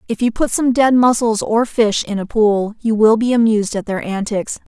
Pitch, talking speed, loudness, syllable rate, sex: 220 Hz, 225 wpm, -16 LUFS, 5.0 syllables/s, female